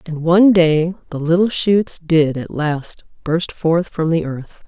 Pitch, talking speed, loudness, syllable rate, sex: 165 Hz, 180 wpm, -17 LUFS, 3.8 syllables/s, female